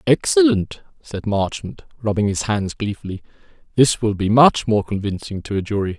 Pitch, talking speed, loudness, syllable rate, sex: 115 Hz, 160 wpm, -19 LUFS, 5.0 syllables/s, male